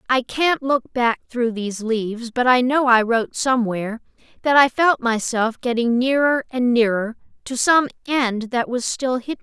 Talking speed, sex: 190 wpm, female